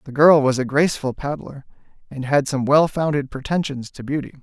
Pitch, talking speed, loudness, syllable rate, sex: 140 Hz, 190 wpm, -20 LUFS, 5.5 syllables/s, male